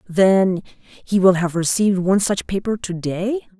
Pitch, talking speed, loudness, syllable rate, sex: 190 Hz, 165 wpm, -19 LUFS, 4.3 syllables/s, female